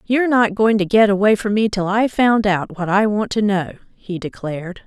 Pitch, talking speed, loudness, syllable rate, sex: 205 Hz, 235 wpm, -17 LUFS, 5.3 syllables/s, female